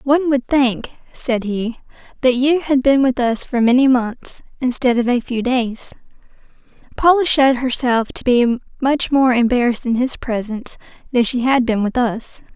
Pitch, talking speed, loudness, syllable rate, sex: 250 Hz, 170 wpm, -17 LUFS, 4.9 syllables/s, female